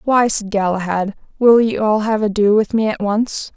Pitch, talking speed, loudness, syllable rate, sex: 215 Hz, 200 wpm, -16 LUFS, 4.7 syllables/s, female